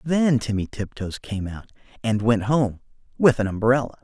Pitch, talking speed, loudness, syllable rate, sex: 115 Hz, 165 wpm, -23 LUFS, 4.6 syllables/s, male